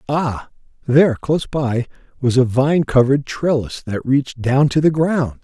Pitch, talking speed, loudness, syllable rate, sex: 135 Hz, 165 wpm, -17 LUFS, 4.7 syllables/s, male